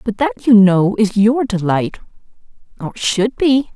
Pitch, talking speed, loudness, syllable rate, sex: 215 Hz, 145 wpm, -15 LUFS, 3.9 syllables/s, female